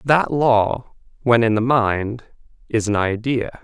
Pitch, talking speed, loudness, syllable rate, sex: 115 Hz, 150 wpm, -19 LUFS, 3.5 syllables/s, male